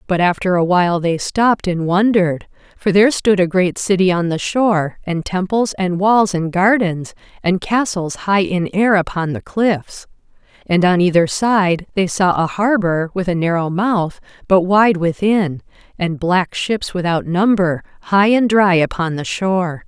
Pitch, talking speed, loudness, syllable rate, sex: 185 Hz, 170 wpm, -16 LUFS, 4.4 syllables/s, female